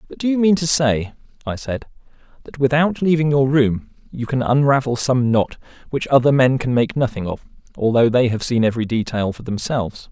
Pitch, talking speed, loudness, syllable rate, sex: 130 Hz, 195 wpm, -18 LUFS, 5.5 syllables/s, male